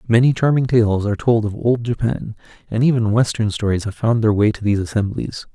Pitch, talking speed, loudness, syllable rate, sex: 110 Hz, 205 wpm, -18 LUFS, 5.8 syllables/s, male